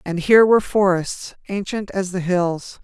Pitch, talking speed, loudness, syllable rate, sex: 190 Hz, 170 wpm, -19 LUFS, 4.7 syllables/s, female